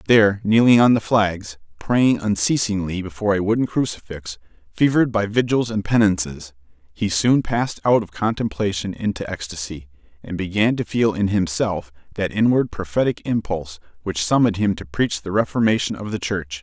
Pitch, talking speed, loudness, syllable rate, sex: 100 Hz, 160 wpm, -20 LUFS, 5.3 syllables/s, male